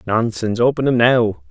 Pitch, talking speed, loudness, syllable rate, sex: 115 Hz, 160 wpm, -16 LUFS, 5.3 syllables/s, male